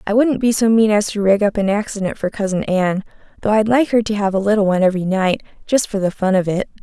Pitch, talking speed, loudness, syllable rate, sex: 205 Hz, 270 wpm, -17 LUFS, 6.4 syllables/s, female